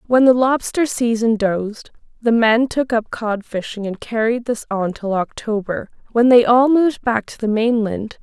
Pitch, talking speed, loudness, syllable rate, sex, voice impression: 230 Hz, 175 wpm, -18 LUFS, 4.6 syllables/s, female, very feminine, slightly middle-aged, very thin, tensed, slightly powerful, bright, soft, slightly clear, fluent, slightly raspy, cute, intellectual, refreshing, slightly sincere, calm, slightly friendly, reassuring, very unique, slightly elegant, slightly wild, slightly sweet, lively, kind, modest